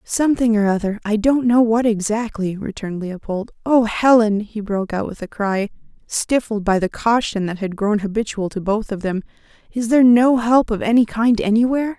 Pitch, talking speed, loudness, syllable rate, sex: 220 Hz, 180 wpm, -18 LUFS, 5.3 syllables/s, female